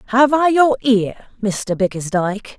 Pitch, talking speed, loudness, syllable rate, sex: 225 Hz, 140 wpm, -17 LUFS, 4.2 syllables/s, female